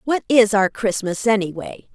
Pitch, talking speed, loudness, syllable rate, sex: 210 Hz, 155 wpm, -18 LUFS, 4.6 syllables/s, female